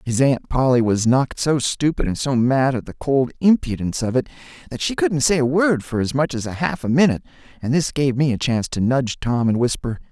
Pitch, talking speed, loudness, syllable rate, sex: 130 Hz, 245 wpm, -20 LUFS, 5.8 syllables/s, male